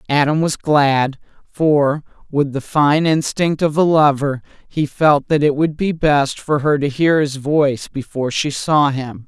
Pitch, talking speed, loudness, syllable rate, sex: 145 Hz, 180 wpm, -17 LUFS, 4.1 syllables/s, female